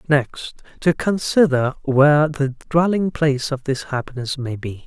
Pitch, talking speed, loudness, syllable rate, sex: 145 Hz, 150 wpm, -19 LUFS, 4.4 syllables/s, male